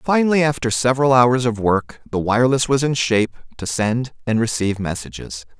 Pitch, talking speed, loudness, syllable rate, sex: 120 Hz, 170 wpm, -18 LUFS, 5.5 syllables/s, male